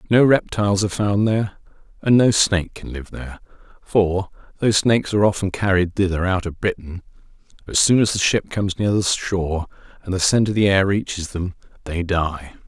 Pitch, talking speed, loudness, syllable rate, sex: 95 Hz, 190 wpm, -19 LUFS, 5.6 syllables/s, male